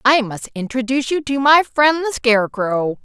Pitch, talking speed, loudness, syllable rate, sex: 255 Hz, 180 wpm, -17 LUFS, 4.9 syllables/s, female